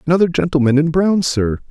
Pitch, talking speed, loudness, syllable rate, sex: 155 Hz, 175 wpm, -15 LUFS, 5.9 syllables/s, male